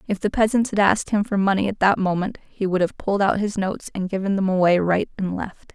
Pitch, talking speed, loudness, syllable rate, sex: 195 Hz, 260 wpm, -21 LUFS, 6.1 syllables/s, female